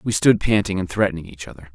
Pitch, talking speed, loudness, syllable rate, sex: 90 Hz, 240 wpm, -19 LUFS, 6.5 syllables/s, male